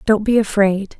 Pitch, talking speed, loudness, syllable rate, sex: 205 Hz, 180 wpm, -16 LUFS, 4.5 syllables/s, female